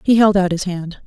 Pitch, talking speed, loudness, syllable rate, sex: 190 Hz, 280 wpm, -16 LUFS, 5.2 syllables/s, female